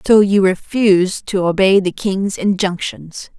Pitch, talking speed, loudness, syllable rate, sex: 195 Hz, 140 wpm, -15 LUFS, 4.1 syllables/s, female